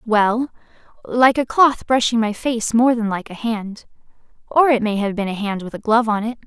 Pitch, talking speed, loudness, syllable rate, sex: 225 Hz, 215 wpm, -18 LUFS, 5.1 syllables/s, female